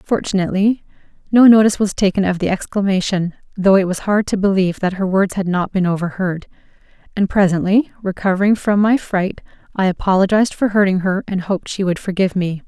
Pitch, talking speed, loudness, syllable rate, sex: 195 Hz, 180 wpm, -17 LUFS, 6.1 syllables/s, female